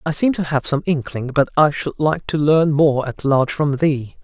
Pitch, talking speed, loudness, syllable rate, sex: 145 Hz, 240 wpm, -18 LUFS, 4.8 syllables/s, male